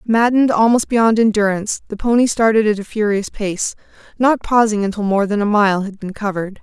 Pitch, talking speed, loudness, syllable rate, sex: 215 Hz, 190 wpm, -16 LUFS, 5.7 syllables/s, female